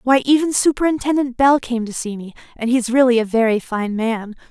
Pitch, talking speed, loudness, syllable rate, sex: 245 Hz, 200 wpm, -18 LUFS, 5.4 syllables/s, female